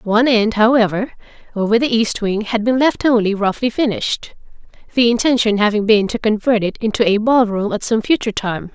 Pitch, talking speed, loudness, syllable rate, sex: 220 Hz, 190 wpm, -16 LUFS, 5.6 syllables/s, female